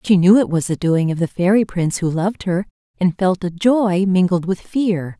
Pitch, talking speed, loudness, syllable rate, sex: 185 Hz, 230 wpm, -17 LUFS, 5.0 syllables/s, female